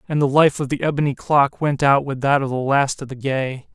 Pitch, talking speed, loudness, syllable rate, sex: 140 Hz, 275 wpm, -19 LUFS, 5.3 syllables/s, male